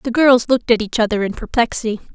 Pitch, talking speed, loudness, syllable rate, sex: 230 Hz, 225 wpm, -17 LUFS, 6.6 syllables/s, female